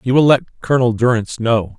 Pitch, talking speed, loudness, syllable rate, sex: 120 Hz, 200 wpm, -16 LUFS, 5.9 syllables/s, male